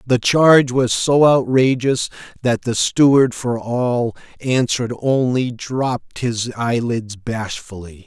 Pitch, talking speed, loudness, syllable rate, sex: 120 Hz, 120 wpm, -17 LUFS, 3.7 syllables/s, male